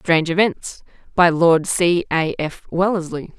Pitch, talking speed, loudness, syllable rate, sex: 170 Hz, 140 wpm, -18 LUFS, 4.1 syllables/s, female